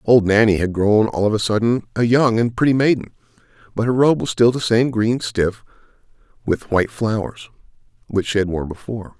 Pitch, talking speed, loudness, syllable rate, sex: 110 Hz, 195 wpm, -18 LUFS, 5.5 syllables/s, male